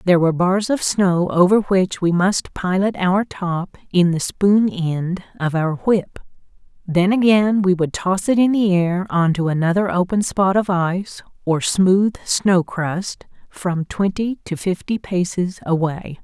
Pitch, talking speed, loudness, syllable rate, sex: 185 Hz, 165 wpm, -18 LUFS, 4.0 syllables/s, female